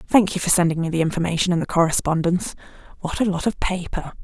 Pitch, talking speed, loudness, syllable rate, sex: 175 Hz, 210 wpm, -21 LUFS, 6.8 syllables/s, female